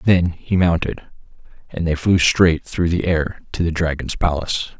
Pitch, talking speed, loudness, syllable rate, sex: 85 Hz, 175 wpm, -19 LUFS, 4.5 syllables/s, male